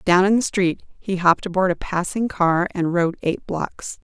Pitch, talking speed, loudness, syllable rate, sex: 185 Hz, 205 wpm, -21 LUFS, 4.6 syllables/s, female